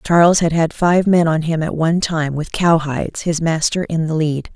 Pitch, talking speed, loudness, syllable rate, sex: 165 Hz, 225 wpm, -17 LUFS, 5.0 syllables/s, female